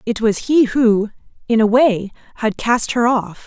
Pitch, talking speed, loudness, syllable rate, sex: 225 Hz, 190 wpm, -16 LUFS, 4.1 syllables/s, female